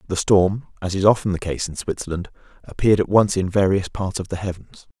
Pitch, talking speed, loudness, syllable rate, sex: 95 Hz, 215 wpm, -20 LUFS, 5.9 syllables/s, male